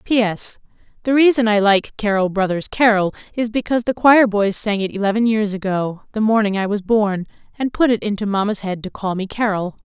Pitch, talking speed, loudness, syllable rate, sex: 210 Hz, 200 wpm, -18 LUFS, 5.3 syllables/s, female